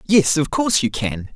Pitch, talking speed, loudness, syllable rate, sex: 160 Hz, 220 wpm, -19 LUFS, 5.2 syllables/s, male